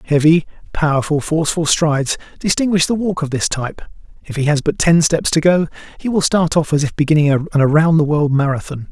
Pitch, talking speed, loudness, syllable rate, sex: 155 Hz, 200 wpm, -16 LUFS, 5.9 syllables/s, male